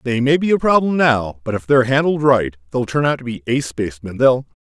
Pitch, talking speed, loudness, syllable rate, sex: 125 Hz, 245 wpm, -17 LUFS, 6.0 syllables/s, male